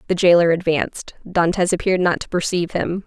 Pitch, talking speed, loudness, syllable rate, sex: 175 Hz, 175 wpm, -19 LUFS, 6.1 syllables/s, female